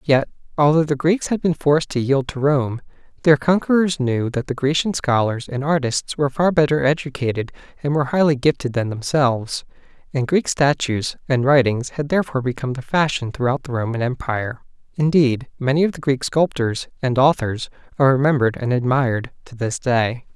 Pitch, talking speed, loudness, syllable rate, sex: 135 Hz, 175 wpm, -19 LUFS, 5.5 syllables/s, male